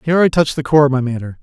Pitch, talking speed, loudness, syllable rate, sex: 145 Hz, 335 wpm, -15 LUFS, 7.5 syllables/s, male